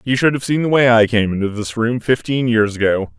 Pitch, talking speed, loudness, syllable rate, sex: 115 Hz, 265 wpm, -16 LUFS, 5.5 syllables/s, male